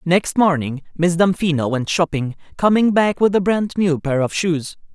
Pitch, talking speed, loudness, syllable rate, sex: 170 Hz, 180 wpm, -18 LUFS, 4.6 syllables/s, male